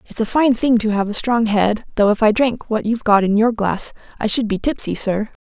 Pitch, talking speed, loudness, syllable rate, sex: 220 Hz, 265 wpm, -17 LUFS, 5.4 syllables/s, female